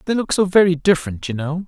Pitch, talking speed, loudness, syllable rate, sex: 170 Hz, 250 wpm, -18 LUFS, 6.6 syllables/s, male